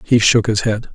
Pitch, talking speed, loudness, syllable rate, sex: 110 Hz, 255 wpm, -15 LUFS, 4.9 syllables/s, male